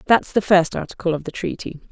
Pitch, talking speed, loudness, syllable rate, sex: 180 Hz, 220 wpm, -20 LUFS, 6.1 syllables/s, female